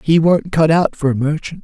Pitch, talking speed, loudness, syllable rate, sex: 155 Hz, 255 wpm, -15 LUFS, 5.7 syllables/s, male